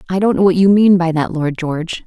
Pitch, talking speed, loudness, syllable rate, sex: 175 Hz, 290 wpm, -14 LUFS, 6.0 syllables/s, female